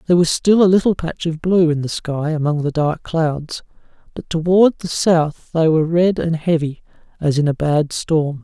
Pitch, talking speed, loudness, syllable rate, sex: 160 Hz, 205 wpm, -17 LUFS, 4.8 syllables/s, male